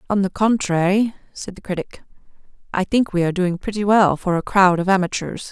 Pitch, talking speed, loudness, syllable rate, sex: 190 Hz, 195 wpm, -19 LUFS, 5.6 syllables/s, female